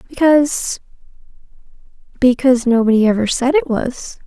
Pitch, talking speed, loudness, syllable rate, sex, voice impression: 255 Hz, 85 wpm, -15 LUFS, 5.3 syllables/s, female, feminine, young, cute, friendly, kind